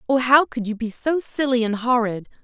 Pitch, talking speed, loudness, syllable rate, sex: 245 Hz, 220 wpm, -20 LUFS, 5.4 syllables/s, female